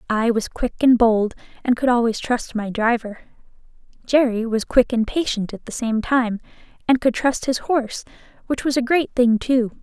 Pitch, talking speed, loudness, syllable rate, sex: 240 Hz, 190 wpm, -20 LUFS, 4.7 syllables/s, female